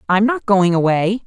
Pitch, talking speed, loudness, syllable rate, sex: 200 Hz, 190 wpm, -16 LUFS, 4.8 syllables/s, female